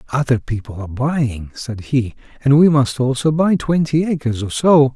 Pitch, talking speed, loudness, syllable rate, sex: 135 Hz, 180 wpm, -17 LUFS, 4.8 syllables/s, male